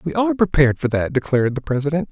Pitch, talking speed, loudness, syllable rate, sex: 150 Hz, 225 wpm, -19 LUFS, 7.5 syllables/s, male